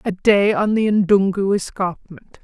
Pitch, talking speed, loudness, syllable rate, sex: 195 Hz, 150 wpm, -17 LUFS, 3.9 syllables/s, female